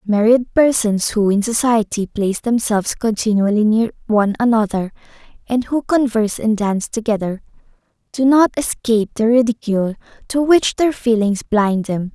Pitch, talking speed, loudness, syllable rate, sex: 225 Hz, 140 wpm, -17 LUFS, 5.1 syllables/s, female